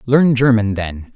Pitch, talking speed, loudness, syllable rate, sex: 115 Hz, 155 wpm, -15 LUFS, 4.0 syllables/s, male